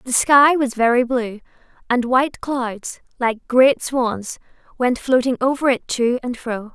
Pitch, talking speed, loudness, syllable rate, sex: 250 Hz, 160 wpm, -18 LUFS, 4.0 syllables/s, female